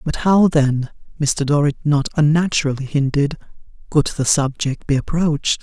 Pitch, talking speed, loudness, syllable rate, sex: 145 Hz, 140 wpm, -18 LUFS, 3.0 syllables/s, female